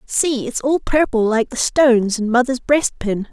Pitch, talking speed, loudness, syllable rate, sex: 250 Hz, 180 wpm, -17 LUFS, 4.4 syllables/s, female